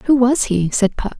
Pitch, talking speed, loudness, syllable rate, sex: 235 Hz, 250 wpm, -16 LUFS, 4.9 syllables/s, female